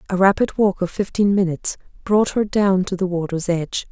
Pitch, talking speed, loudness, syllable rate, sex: 190 Hz, 200 wpm, -19 LUFS, 5.6 syllables/s, female